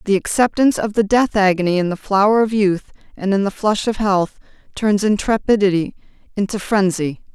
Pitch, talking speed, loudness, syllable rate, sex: 200 Hz, 170 wpm, -17 LUFS, 5.4 syllables/s, female